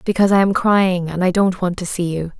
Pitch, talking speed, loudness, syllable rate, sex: 185 Hz, 275 wpm, -17 LUFS, 5.8 syllables/s, female